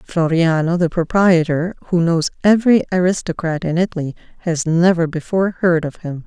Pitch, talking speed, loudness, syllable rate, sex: 170 Hz, 145 wpm, -17 LUFS, 5.3 syllables/s, female